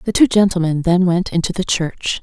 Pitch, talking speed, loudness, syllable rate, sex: 180 Hz, 215 wpm, -16 LUFS, 5.2 syllables/s, female